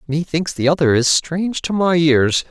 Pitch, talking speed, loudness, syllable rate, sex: 160 Hz, 190 wpm, -16 LUFS, 4.7 syllables/s, male